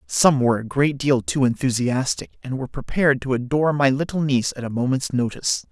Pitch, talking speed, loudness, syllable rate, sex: 135 Hz, 200 wpm, -21 LUFS, 6.0 syllables/s, male